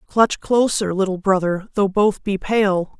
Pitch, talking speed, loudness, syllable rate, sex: 200 Hz, 160 wpm, -19 LUFS, 4.0 syllables/s, female